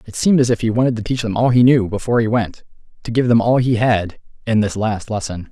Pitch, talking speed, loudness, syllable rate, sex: 115 Hz, 250 wpm, -17 LUFS, 6.4 syllables/s, male